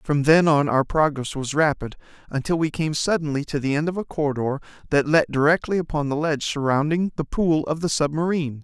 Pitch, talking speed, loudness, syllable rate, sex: 150 Hz, 200 wpm, -22 LUFS, 5.8 syllables/s, male